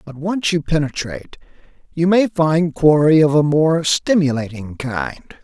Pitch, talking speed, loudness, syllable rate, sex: 155 Hz, 145 wpm, -17 LUFS, 4.4 syllables/s, male